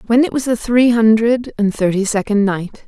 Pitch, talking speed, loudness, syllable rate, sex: 225 Hz, 210 wpm, -15 LUFS, 4.9 syllables/s, female